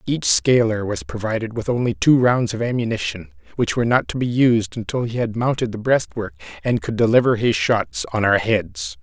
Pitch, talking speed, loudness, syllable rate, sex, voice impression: 115 Hz, 200 wpm, -20 LUFS, 5.2 syllables/s, male, very masculine, adult-like, thick, cool, sincere, slightly calm, slightly wild